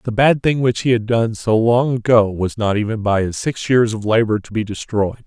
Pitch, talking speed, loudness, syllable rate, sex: 110 Hz, 250 wpm, -17 LUFS, 5.1 syllables/s, male